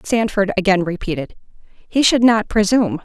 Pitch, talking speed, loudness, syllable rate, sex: 205 Hz, 140 wpm, -17 LUFS, 5.2 syllables/s, female